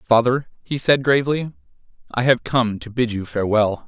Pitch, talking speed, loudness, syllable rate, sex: 120 Hz, 170 wpm, -20 LUFS, 5.2 syllables/s, male